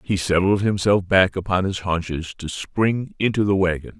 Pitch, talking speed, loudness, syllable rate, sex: 95 Hz, 180 wpm, -21 LUFS, 4.7 syllables/s, male